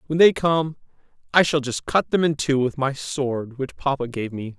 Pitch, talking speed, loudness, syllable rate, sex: 140 Hz, 220 wpm, -22 LUFS, 4.6 syllables/s, male